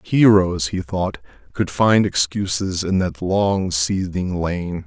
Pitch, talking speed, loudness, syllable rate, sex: 90 Hz, 135 wpm, -19 LUFS, 3.4 syllables/s, male